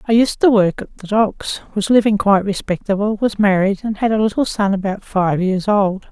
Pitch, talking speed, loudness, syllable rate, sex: 205 Hz, 215 wpm, -17 LUFS, 5.2 syllables/s, female